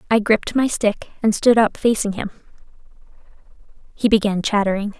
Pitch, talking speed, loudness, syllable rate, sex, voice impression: 215 Hz, 145 wpm, -18 LUFS, 5.7 syllables/s, female, very feminine, young, slightly adult-like, very thin, tensed, slightly powerful, very bright, hard, clear, fluent, very cute, intellectual, refreshing, slightly sincere, slightly calm, very friendly, reassuring, slightly wild, very sweet, lively, kind, slightly intense, slightly sharp